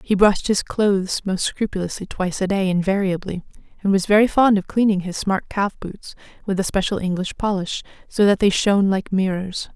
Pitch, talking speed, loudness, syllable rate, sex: 195 Hz, 190 wpm, -20 LUFS, 5.5 syllables/s, female